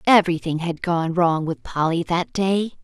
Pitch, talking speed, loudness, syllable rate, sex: 170 Hz, 170 wpm, -21 LUFS, 4.6 syllables/s, female